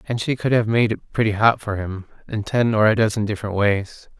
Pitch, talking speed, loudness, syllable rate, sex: 110 Hz, 245 wpm, -20 LUFS, 5.8 syllables/s, male